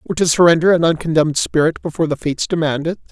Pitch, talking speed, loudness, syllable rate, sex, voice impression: 160 Hz, 210 wpm, -16 LUFS, 7.2 syllables/s, male, masculine, middle-aged, tensed, powerful, bright, clear, fluent, cool, friendly, reassuring, wild, lively, slightly intense, slightly sharp